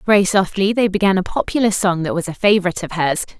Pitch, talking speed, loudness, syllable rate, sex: 190 Hz, 230 wpm, -17 LUFS, 6.7 syllables/s, female